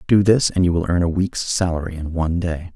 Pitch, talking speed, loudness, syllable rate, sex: 85 Hz, 260 wpm, -19 LUFS, 5.8 syllables/s, male